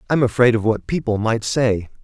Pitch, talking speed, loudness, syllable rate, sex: 115 Hz, 205 wpm, -19 LUFS, 5.2 syllables/s, male